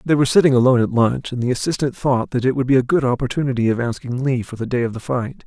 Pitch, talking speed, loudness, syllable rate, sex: 125 Hz, 285 wpm, -19 LUFS, 7.1 syllables/s, male